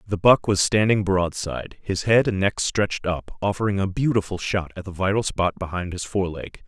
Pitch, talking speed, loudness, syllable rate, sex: 95 Hz, 205 wpm, -22 LUFS, 5.3 syllables/s, male